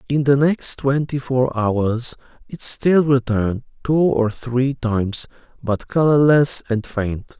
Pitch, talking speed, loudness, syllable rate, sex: 130 Hz, 140 wpm, -19 LUFS, 3.7 syllables/s, male